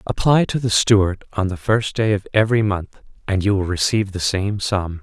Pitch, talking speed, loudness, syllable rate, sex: 100 Hz, 215 wpm, -19 LUFS, 5.3 syllables/s, male